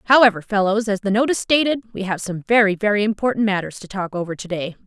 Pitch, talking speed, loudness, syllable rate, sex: 205 Hz, 220 wpm, -19 LUFS, 6.8 syllables/s, female